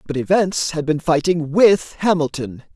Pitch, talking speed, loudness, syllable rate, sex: 160 Hz, 150 wpm, -18 LUFS, 4.5 syllables/s, male